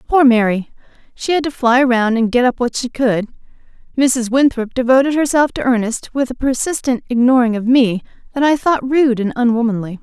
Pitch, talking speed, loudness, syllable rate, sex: 250 Hz, 185 wpm, -15 LUFS, 5.3 syllables/s, female